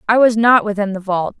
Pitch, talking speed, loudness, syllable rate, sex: 210 Hz, 255 wpm, -15 LUFS, 5.7 syllables/s, female